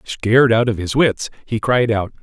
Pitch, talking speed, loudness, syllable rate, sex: 115 Hz, 215 wpm, -16 LUFS, 4.7 syllables/s, male